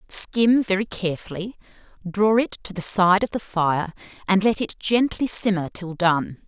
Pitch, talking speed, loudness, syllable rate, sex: 195 Hz, 165 wpm, -21 LUFS, 4.4 syllables/s, female